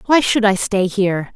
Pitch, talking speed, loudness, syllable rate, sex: 210 Hz, 220 wpm, -16 LUFS, 5.2 syllables/s, female